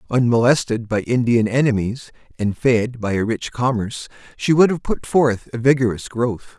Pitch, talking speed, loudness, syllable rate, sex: 120 Hz, 165 wpm, -19 LUFS, 4.9 syllables/s, male